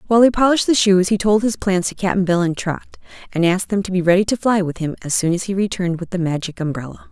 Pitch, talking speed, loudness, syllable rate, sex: 190 Hz, 280 wpm, -18 LUFS, 6.8 syllables/s, female